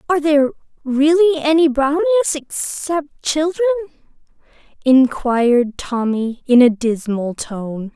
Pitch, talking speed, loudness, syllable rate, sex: 285 Hz, 105 wpm, -17 LUFS, 4.3 syllables/s, female